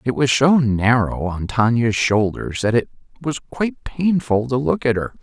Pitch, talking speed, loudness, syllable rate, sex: 120 Hz, 185 wpm, -19 LUFS, 4.6 syllables/s, male